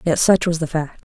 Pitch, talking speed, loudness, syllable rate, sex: 165 Hz, 280 wpm, -18 LUFS, 5.2 syllables/s, female